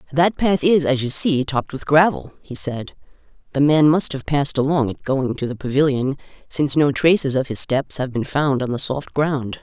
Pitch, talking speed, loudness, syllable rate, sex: 140 Hz, 220 wpm, -19 LUFS, 5.1 syllables/s, female